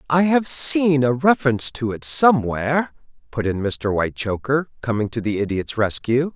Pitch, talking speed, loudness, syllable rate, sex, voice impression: 130 Hz, 160 wpm, -19 LUFS, 5.1 syllables/s, male, very masculine, middle-aged, very thick, very tensed, powerful, bright, slightly hard, clear, fluent, slightly raspy, cool, very intellectual, slightly refreshing, sincere, calm, very friendly, very reassuring, unique, elegant, slightly wild, sweet, lively, kind, slightly intense